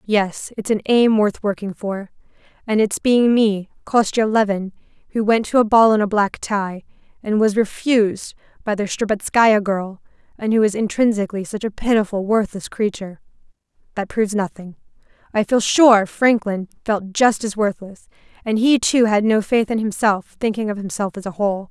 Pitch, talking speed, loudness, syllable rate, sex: 210 Hz, 170 wpm, -18 LUFS, 5.0 syllables/s, female